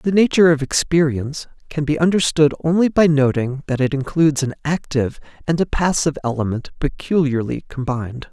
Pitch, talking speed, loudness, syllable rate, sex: 150 Hz, 150 wpm, -18 LUFS, 5.8 syllables/s, male